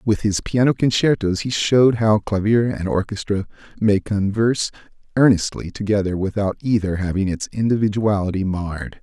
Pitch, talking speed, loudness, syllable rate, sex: 105 Hz, 135 wpm, -20 LUFS, 5.2 syllables/s, male